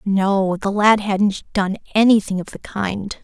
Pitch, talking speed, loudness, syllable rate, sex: 200 Hz, 165 wpm, -18 LUFS, 3.9 syllables/s, female